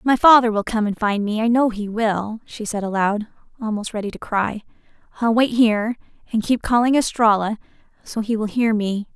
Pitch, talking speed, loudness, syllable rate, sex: 220 Hz, 195 wpm, -20 LUFS, 5.2 syllables/s, female